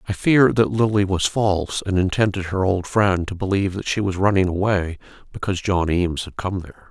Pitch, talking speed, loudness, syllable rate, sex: 95 Hz, 210 wpm, -20 LUFS, 5.5 syllables/s, male